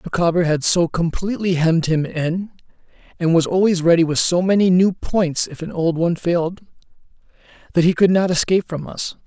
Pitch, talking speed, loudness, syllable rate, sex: 175 Hz, 180 wpm, -18 LUFS, 5.8 syllables/s, male